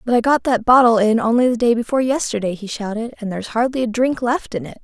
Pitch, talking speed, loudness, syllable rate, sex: 235 Hz, 260 wpm, -18 LUFS, 6.4 syllables/s, female